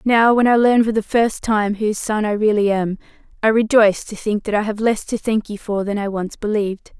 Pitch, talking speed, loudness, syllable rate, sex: 215 Hz, 250 wpm, -18 LUFS, 5.5 syllables/s, female